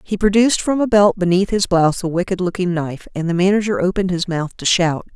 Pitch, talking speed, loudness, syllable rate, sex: 185 Hz, 235 wpm, -17 LUFS, 6.3 syllables/s, female